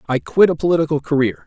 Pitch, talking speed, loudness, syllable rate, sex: 150 Hz, 205 wpm, -17 LUFS, 7.0 syllables/s, male